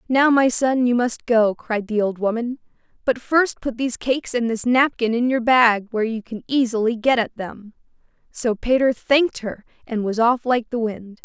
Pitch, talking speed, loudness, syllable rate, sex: 235 Hz, 205 wpm, -20 LUFS, 4.8 syllables/s, female